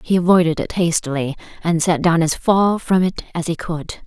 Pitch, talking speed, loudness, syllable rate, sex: 170 Hz, 205 wpm, -18 LUFS, 5.1 syllables/s, female